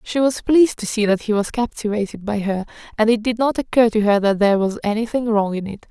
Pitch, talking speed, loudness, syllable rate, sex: 220 Hz, 255 wpm, -19 LUFS, 6.1 syllables/s, female